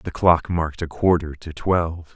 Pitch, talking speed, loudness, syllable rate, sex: 85 Hz, 195 wpm, -21 LUFS, 5.1 syllables/s, male